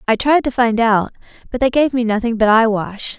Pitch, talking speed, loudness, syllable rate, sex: 235 Hz, 225 wpm, -16 LUFS, 5.4 syllables/s, female